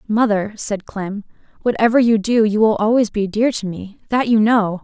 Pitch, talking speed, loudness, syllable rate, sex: 215 Hz, 185 wpm, -17 LUFS, 4.8 syllables/s, female